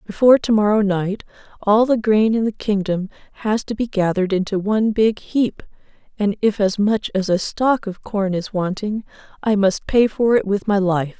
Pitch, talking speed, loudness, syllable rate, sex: 205 Hz, 200 wpm, -19 LUFS, 4.9 syllables/s, female